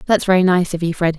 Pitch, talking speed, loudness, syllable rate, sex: 180 Hz, 305 wpm, -16 LUFS, 7.9 syllables/s, female